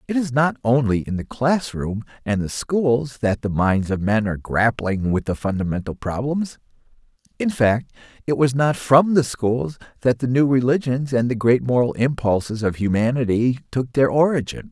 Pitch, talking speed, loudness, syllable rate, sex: 125 Hz, 180 wpm, -20 LUFS, 4.8 syllables/s, male